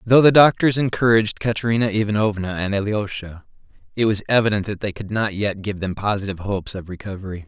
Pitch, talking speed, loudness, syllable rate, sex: 105 Hz, 175 wpm, -20 LUFS, 6.3 syllables/s, male